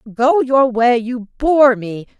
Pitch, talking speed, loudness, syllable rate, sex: 245 Hz, 165 wpm, -14 LUFS, 3.3 syllables/s, female